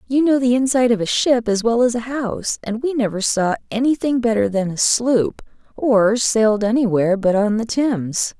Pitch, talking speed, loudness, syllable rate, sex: 230 Hz, 215 wpm, -18 LUFS, 5.2 syllables/s, female